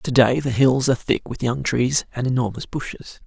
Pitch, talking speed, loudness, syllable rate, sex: 130 Hz, 220 wpm, -21 LUFS, 5.2 syllables/s, male